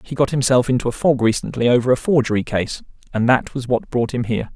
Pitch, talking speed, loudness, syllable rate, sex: 125 Hz, 235 wpm, -19 LUFS, 6.3 syllables/s, male